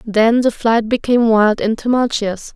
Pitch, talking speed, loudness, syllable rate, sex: 225 Hz, 165 wpm, -15 LUFS, 4.5 syllables/s, female